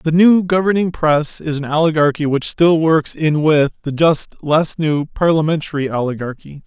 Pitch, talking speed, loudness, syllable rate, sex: 155 Hz, 160 wpm, -16 LUFS, 4.7 syllables/s, male